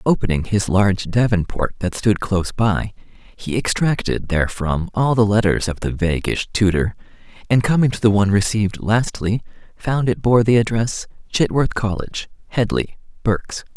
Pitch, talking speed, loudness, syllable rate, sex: 105 Hz, 150 wpm, -19 LUFS, 4.9 syllables/s, male